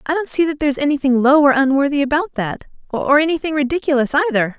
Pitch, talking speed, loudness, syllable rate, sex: 285 Hz, 195 wpm, -16 LUFS, 6.9 syllables/s, female